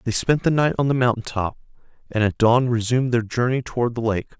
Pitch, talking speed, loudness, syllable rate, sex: 120 Hz, 230 wpm, -21 LUFS, 5.9 syllables/s, male